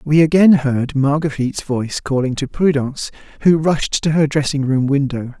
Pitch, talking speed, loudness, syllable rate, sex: 145 Hz, 165 wpm, -16 LUFS, 5.1 syllables/s, male